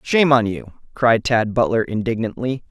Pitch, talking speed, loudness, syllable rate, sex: 115 Hz, 155 wpm, -18 LUFS, 5.1 syllables/s, male